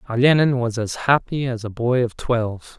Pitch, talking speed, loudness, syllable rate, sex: 120 Hz, 195 wpm, -20 LUFS, 5.0 syllables/s, male